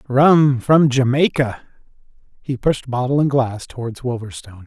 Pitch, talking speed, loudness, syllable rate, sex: 130 Hz, 130 wpm, -17 LUFS, 4.5 syllables/s, male